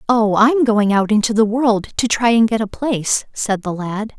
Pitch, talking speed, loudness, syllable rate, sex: 220 Hz, 230 wpm, -16 LUFS, 4.6 syllables/s, female